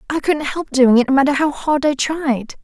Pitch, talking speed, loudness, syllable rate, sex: 280 Hz, 250 wpm, -16 LUFS, 5.0 syllables/s, female